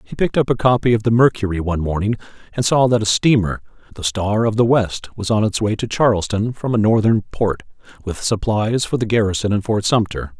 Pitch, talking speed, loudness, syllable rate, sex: 110 Hz, 220 wpm, -18 LUFS, 5.7 syllables/s, male